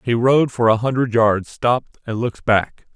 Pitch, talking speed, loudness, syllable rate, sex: 115 Hz, 205 wpm, -18 LUFS, 4.8 syllables/s, male